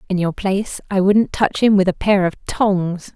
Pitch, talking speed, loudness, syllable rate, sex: 195 Hz, 230 wpm, -17 LUFS, 4.5 syllables/s, female